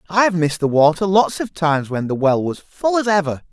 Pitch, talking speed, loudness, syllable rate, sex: 170 Hz, 240 wpm, -18 LUFS, 5.8 syllables/s, male